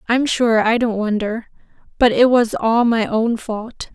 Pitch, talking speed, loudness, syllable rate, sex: 230 Hz, 180 wpm, -17 LUFS, 4.1 syllables/s, female